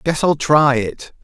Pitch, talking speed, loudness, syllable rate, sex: 140 Hz, 195 wpm, -15 LUFS, 3.7 syllables/s, male